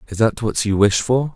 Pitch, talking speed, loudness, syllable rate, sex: 110 Hz, 265 wpm, -18 LUFS, 5.0 syllables/s, male